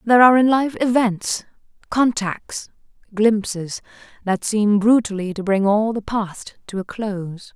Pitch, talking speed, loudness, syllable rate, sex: 215 Hz, 145 wpm, -19 LUFS, 4.3 syllables/s, female